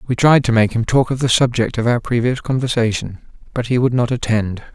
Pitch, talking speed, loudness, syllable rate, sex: 120 Hz, 230 wpm, -17 LUFS, 5.7 syllables/s, male